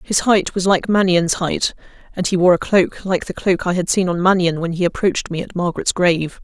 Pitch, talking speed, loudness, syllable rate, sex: 180 Hz, 245 wpm, -17 LUFS, 5.5 syllables/s, female